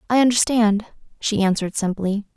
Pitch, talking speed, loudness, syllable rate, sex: 215 Hz, 125 wpm, -20 LUFS, 5.5 syllables/s, female